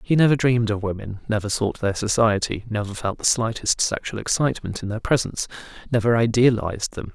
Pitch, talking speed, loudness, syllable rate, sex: 110 Hz, 175 wpm, -22 LUFS, 6.0 syllables/s, male